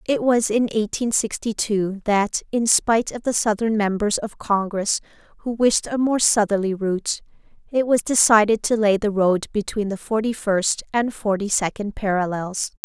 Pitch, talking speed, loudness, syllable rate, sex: 210 Hz, 170 wpm, -21 LUFS, 4.7 syllables/s, female